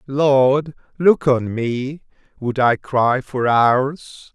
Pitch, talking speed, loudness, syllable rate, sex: 130 Hz, 125 wpm, -18 LUFS, 2.5 syllables/s, male